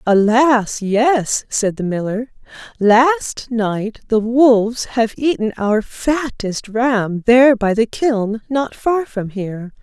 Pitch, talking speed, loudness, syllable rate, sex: 230 Hz, 135 wpm, -16 LUFS, 3.3 syllables/s, female